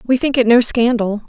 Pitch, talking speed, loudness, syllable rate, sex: 235 Hz, 235 wpm, -14 LUFS, 5.2 syllables/s, female